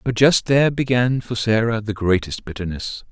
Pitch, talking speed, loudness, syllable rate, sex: 115 Hz, 175 wpm, -19 LUFS, 5.0 syllables/s, male